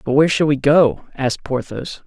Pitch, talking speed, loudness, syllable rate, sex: 145 Hz, 205 wpm, -17 LUFS, 5.3 syllables/s, male